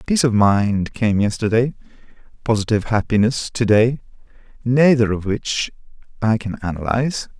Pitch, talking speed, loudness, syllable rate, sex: 110 Hz, 120 wpm, -18 LUFS, 5.0 syllables/s, male